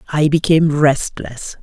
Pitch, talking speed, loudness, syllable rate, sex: 150 Hz, 110 wpm, -15 LUFS, 4.4 syllables/s, female